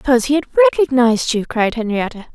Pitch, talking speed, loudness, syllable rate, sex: 255 Hz, 180 wpm, -16 LUFS, 7.9 syllables/s, female